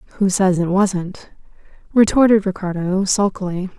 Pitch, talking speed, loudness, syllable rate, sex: 190 Hz, 110 wpm, -17 LUFS, 4.8 syllables/s, female